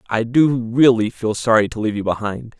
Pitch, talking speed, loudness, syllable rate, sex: 115 Hz, 210 wpm, -18 LUFS, 5.5 syllables/s, male